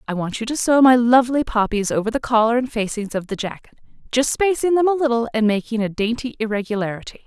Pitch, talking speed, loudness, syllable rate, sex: 235 Hz, 215 wpm, -19 LUFS, 6.3 syllables/s, female